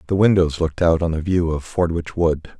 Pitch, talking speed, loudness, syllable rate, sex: 85 Hz, 230 wpm, -19 LUFS, 5.9 syllables/s, male